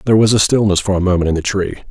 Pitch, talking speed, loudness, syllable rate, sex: 100 Hz, 285 wpm, -14 LUFS, 7.5 syllables/s, male